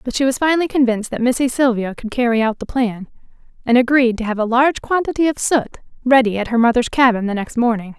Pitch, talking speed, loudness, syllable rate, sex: 245 Hz, 225 wpm, -17 LUFS, 6.4 syllables/s, female